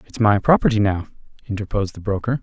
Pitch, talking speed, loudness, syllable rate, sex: 105 Hz, 175 wpm, -20 LUFS, 6.7 syllables/s, male